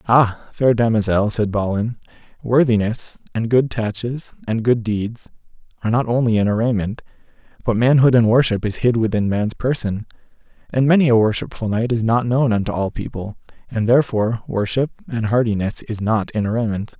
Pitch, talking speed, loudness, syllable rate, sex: 115 Hz, 160 wpm, -19 LUFS, 5.3 syllables/s, male